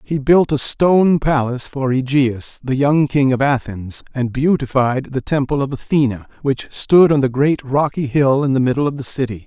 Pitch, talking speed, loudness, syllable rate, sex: 135 Hz, 195 wpm, -17 LUFS, 4.9 syllables/s, male